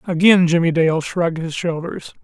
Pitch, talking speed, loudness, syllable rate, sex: 170 Hz, 160 wpm, -17 LUFS, 5.0 syllables/s, male